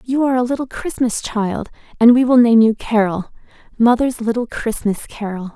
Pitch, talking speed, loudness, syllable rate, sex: 235 Hz, 160 wpm, -17 LUFS, 5.1 syllables/s, female